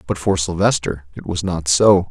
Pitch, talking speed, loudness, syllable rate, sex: 85 Hz, 200 wpm, -18 LUFS, 4.8 syllables/s, male